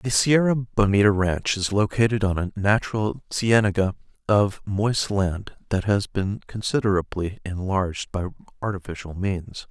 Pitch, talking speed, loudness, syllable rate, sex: 100 Hz, 130 wpm, -23 LUFS, 4.6 syllables/s, male